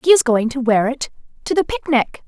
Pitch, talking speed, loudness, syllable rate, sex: 270 Hz, 235 wpm, -18 LUFS, 5.5 syllables/s, female